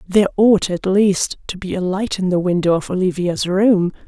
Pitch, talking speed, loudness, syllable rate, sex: 190 Hz, 205 wpm, -17 LUFS, 5.0 syllables/s, female